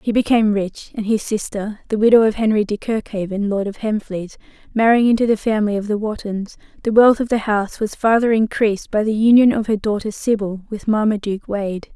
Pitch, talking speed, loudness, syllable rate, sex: 215 Hz, 200 wpm, -18 LUFS, 4.7 syllables/s, female